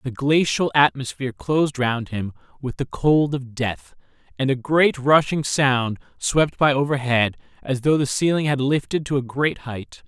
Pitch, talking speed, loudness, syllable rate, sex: 135 Hz, 175 wpm, -21 LUFS, 4.4 syllables/s, male